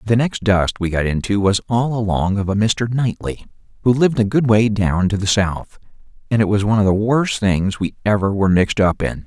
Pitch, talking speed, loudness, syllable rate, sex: 105 Hz, 235 wpm, -17 LUFS, 5.5 syllables/s, male